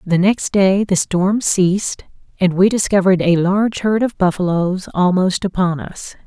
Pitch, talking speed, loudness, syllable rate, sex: 190 Hz, 165 wpm, -16 LUFS, 4.6 syllables/s, female